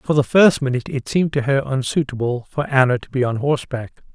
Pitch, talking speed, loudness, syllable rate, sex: 135 Hz, 215 wpm, -19 LUFS, 6.1 syllables/s, male